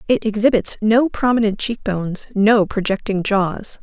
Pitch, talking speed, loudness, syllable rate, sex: 210 Hz, 125 wpm, -18 LUFS, 4.5 syllables/s, female